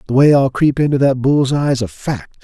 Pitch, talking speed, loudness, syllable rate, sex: 135 Hz, 245 wpm, -15 LUFS, 5.0 syllables/s, male